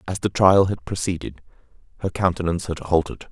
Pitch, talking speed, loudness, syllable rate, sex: 90 Hz, 165 wpm, -21 LUFS, 6.3 syllables/s, male